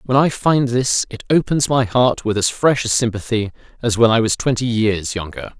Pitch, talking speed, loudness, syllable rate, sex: 120 Hz, 215 wpm, -17 LUFS, 4.9 syllables/s, male